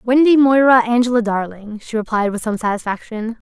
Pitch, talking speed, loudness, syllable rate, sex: 230 Hz, 155 wpm, -16 LUFS, 5.6 syllables/s, female